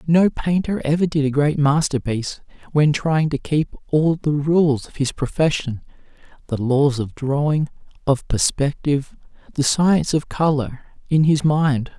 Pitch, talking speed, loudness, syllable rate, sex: 145 Hz, 150 wpm, -20 LUFS, 4.4 syllables/s, male